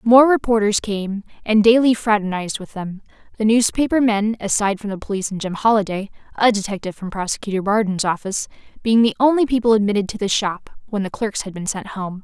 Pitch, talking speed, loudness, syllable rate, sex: 210 Hz, 190 wpm, -19 LUFS, 6.2 syllables/s, female